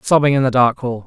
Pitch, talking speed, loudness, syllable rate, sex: 130 Hz, 280 wpm, -15 LUFS, 6.2 syllables/s, male